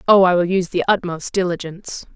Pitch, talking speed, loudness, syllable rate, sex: 180 Hz, 195 wpm, -18 LUFS, 6.4 syllables/s, female